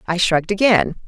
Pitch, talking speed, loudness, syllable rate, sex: 185 Hz, 165 wpm, -16 LUFS, 5.9 syllables/s, female